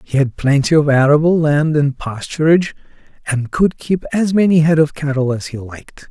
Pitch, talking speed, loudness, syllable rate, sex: 150 Hz, 185 wpm, -15 LUFS, 5.2 syllables/s, male